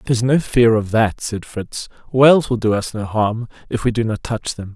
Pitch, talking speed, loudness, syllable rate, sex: 115 Hz, 250 wpm, -18 LUFS, 5.3 syllables/s, male